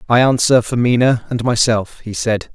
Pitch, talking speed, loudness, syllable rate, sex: 115 Hz, 190 wpm, -15 LUFS, 4.7 syllables/s, male